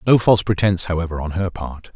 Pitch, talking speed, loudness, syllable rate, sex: 90 Hz, 215 wpm, -19 LUFS, 6.6 syllables/s, male